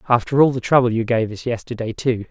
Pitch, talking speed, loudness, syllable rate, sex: 120 Hz, 235 wpm, -19 LUFS, 6.2 syllables/s, male